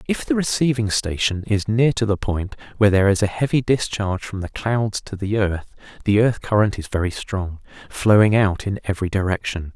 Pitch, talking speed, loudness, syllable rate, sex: 105 Hz, 190 wpm, -20 LUFS, 5.4 syllables/s, male